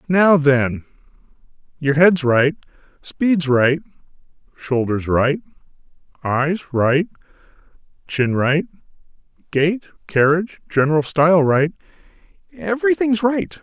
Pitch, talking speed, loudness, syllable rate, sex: 160 Hz, 80 wpm, -18 LUFS, 3.9 syllables/s, male